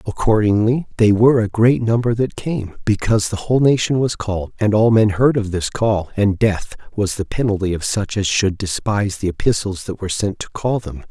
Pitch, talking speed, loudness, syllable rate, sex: 105 Hz, 210 wpm, -18 LUFS, 5.4 syllables/s, male